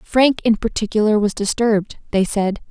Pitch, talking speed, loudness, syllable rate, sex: 215 Hz, 155 wpm, -18 LUFS, 5.0 syllables/s, female